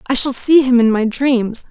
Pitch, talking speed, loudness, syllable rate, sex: 250 Hz, 245 wpm, -13 LUFS, 4.5 syllables/s, female